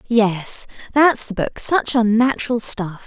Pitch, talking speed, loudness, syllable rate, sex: 225 Hz, 135 wpm, -17 LUFS, 3.9 syllables/s, female